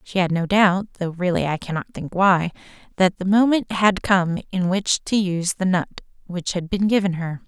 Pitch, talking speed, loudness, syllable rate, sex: 185 Hz, 210 wpm, -21 LUFS, 4.0 syllables/s, female